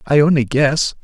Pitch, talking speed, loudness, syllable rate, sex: 145 Hz, 175 wpm, -15 LUFS, 4.7 syllables/s, male